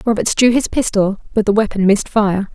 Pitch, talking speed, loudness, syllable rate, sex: 210 Hz, 210 wpm, -15 LUFS, 5.7 syllables/s, female